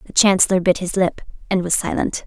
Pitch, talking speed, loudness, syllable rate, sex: 190 Hz, 210 wpm, -18 LUFS, 5.9 syllables/s, female